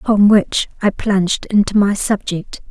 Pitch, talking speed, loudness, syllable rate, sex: 200 Hz, 155 wpm, -16 LUFS, 4.4 syllables/s, female